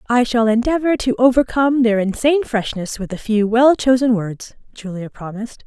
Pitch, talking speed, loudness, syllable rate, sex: 235 Hz, 170 wpm, -17 LUFS, 5.3 syllables/s, female